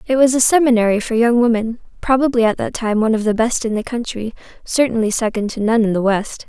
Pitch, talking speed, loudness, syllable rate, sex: 230 Hz, 230 wpm, -16 LUFS, 6.2 syllables/s, female